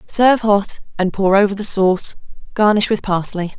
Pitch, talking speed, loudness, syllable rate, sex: 200 Hz, 165 wpm, -16 LUFS, 5.2 syllables/s, female